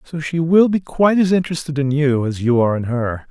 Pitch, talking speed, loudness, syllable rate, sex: 150 Hz, 255 wpm, -17 LUFS, 6.2 syllables/s, male